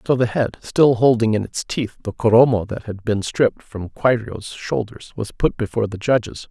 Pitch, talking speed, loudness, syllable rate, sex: 110 Hz, 205 wpm, -19 LUFS, 5.0 syllables/s, male